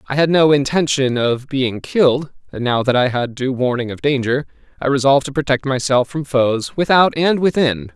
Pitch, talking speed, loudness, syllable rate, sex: 135 Hz, 195 wpm, -17 LUFS, 5.1 syllables/s, male